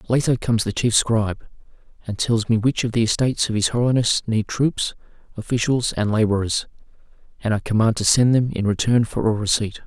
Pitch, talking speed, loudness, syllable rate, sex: 115 Hz, 190 wpm, -20 LUFS, 5.7 syllables/s, male